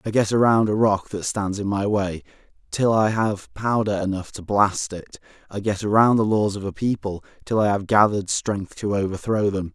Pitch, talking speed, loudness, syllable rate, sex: 100 Hz, 210 wpm, -22 LUFS, 5.1 syllables/s, male